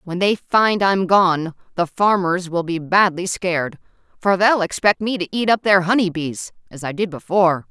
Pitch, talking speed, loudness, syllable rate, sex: 185 Hz, 195 wpm, -18 LUFS, 4.7 syllables/s, female